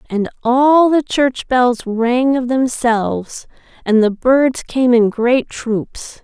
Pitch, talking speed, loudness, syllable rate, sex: 245 Hz, 145 wpm, -15 LUFS, 3.1 syllables/s, female